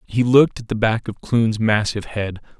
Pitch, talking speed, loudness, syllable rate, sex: 110 Hz, 210 wpm, -19 LUFS, 5.4 syllables/s, male